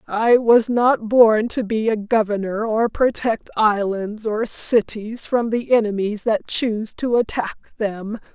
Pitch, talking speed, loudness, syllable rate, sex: 220 Hz, 150 wpm, -19 LUFS, 3.9 syllables/s, female